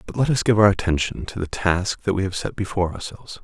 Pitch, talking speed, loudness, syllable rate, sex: 100 Hz, 260 wpm, -22 LUFS, 6.4 syllables/s, male